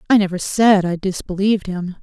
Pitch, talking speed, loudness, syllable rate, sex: 195 Hz, 180 wpm, -18 LUFS, 5.6 syllables/s, female